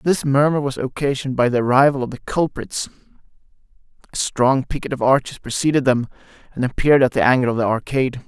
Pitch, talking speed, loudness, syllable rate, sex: 130 Hz, 180 wpm, -19 LUFS, 6.3 syllables/s, male